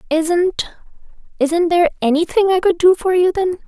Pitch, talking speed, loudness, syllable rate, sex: 345 Hz, 145 wpm, -16 LUFS, 5.0 syllables/s, female